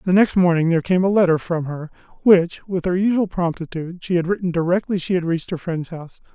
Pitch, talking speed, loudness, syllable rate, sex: 175 Hz, 225 wpm, -20 LUFS, 6.3 syllables/s, male